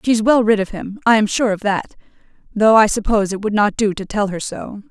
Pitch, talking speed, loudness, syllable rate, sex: 210 Hz, 235 wpm, -17 LUFS, 5.4 syllables/s, female